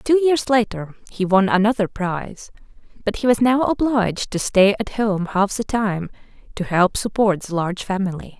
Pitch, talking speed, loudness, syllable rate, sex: 210 Hz, 180 wpm, -20 LUFS, 4.9 syllables/s, female